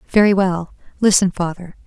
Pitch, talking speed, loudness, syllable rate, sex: 185 Hz, 130 wpm, -17 LUFS, 5.2 syllables/s, female